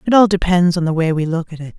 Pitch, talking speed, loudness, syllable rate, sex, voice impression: 175 Hz, 335 wpm, -16 LUFS, 6.6 syllables/s, female, very feminine, very adult-like, very middle-aged, thin, slightly tensed, slightly weak, dark, slightly soft, slightly clear, fluent, slightly cute, very intellectual, slightly refreshing, sincere, very calm, slightly friendly, slightly reassuring, unique, very elegant, sweet, slightly lively, kind, modest